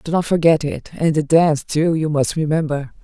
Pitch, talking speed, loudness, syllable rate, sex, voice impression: 155 Hz, 215 wpm, -18 LUFS, 5.3 syllables/s, female, feminine, middle-aged, powerful, slightly hard, raspy, intellectual, calm, elegant, lively, strict, sharp